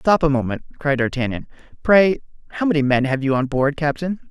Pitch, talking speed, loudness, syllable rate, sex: 145 Hz, 195 wpm, -19 LUFS, 5.8 syllables/s, male